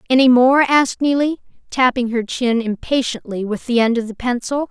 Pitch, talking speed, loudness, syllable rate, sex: 250 Hz, 180 wpm, -17 LUFS, 5.3 syllables/s, female